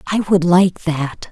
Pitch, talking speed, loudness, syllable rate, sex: 175 Hz, 185 wpm, -16 LUFS, 3.7 syllables/s, female